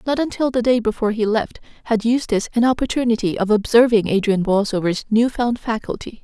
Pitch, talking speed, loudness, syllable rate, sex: 225 Hz, 175 wpm, -19 LUFS, 6.0 syllables/s, female